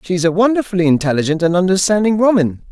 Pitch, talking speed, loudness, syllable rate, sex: 185 Hz, 175 wpm, -14 LUFS, 7.0 syllables/s, male